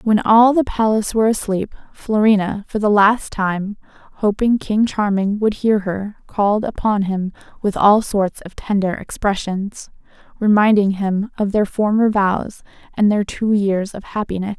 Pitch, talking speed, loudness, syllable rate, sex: 205 Hz, 155 wpm, -18 LUFS, 4.5 syllables/s, female